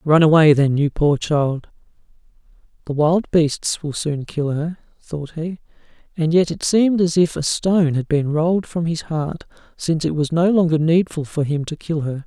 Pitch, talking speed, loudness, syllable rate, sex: 155 Hz, 195 wpm, -19 LUFS, 4.7 syllables/s, male